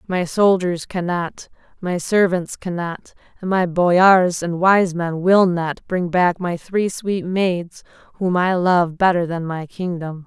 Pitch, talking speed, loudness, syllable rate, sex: 180 Hz, 160 wpm, -19 LUFS, 3.6 syllables/s, female